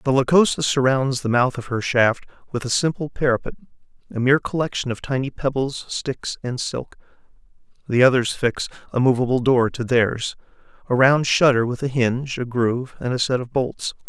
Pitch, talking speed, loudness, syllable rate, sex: 130 Hz, 180 wpm, -21 LUFS, 5.3 syllables/s, male